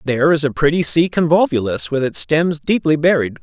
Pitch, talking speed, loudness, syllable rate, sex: 150 Hz, 195 wpm, -16 LUFS, 5.5 syllables/s, male